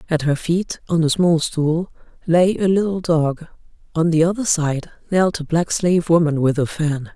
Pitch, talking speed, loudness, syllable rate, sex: 165 Hz, 195 wpm, -19 LUFS, 4.6 syllables/s, female